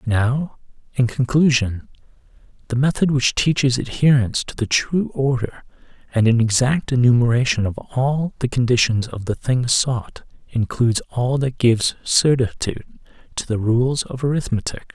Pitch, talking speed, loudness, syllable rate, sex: 125 Hz, 135 wpm, -19 LUFS, 4.7 syllables/s, male